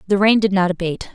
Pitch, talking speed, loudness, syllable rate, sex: 195 Hz, 260 wpm, -17 LUFS, 7.5 syllables/s, female